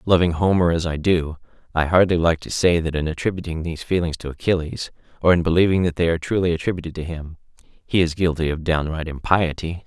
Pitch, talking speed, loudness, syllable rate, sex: 85 Hz, 200 wpm, -21 LUFS, 6.1 syllables/s, male